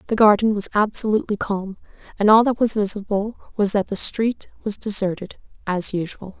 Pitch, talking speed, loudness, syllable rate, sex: 205 Hz, 170 wpm, -20 LUFS, 5.4 syllables/s, female